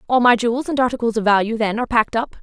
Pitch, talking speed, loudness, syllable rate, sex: 235 Hz, 275 wpm, -18 LUFS, 7.6 syllables/s, female